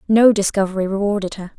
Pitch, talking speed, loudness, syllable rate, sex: 200 Hz, 150 wpm, -18 LUFS, 6.3 syllables/s, female